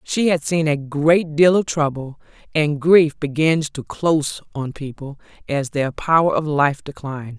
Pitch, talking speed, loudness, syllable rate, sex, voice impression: 150 Hz, 170 wpm, -19 LUFS, 4.3 syllables/s, female, slightly feminine, adult-like, friendly, slightly unique